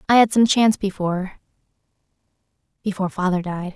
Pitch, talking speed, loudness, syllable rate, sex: 195 Hz, 110 wpm, -20 LUFS, 6.6 syllables/s, female